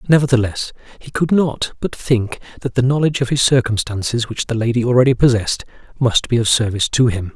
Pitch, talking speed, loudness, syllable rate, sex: 120 Hz, 190 wpm, -17 LUFS, 6.0 syllables/s, male